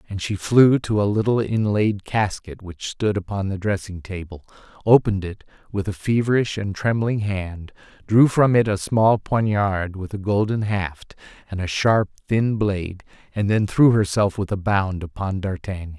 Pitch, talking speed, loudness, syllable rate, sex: 100 Hz, 175 wpm, -21 LUFS, 4.6 syllables/s, male